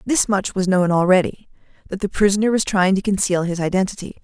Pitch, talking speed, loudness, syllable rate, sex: 195 Hz, 200 wpm, -18 LUFS, 6.0 syllables/s, female